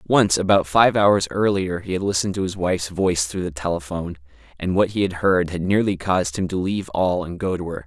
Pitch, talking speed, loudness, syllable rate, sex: 90 Hz, 235 wpm, -21 LUFS, 5.9 syllables/s, male